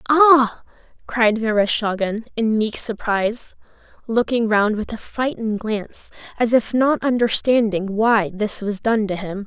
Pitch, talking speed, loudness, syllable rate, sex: 225 Hz, 140 wpm, -19 LUFS, 4.3 syllables/s, female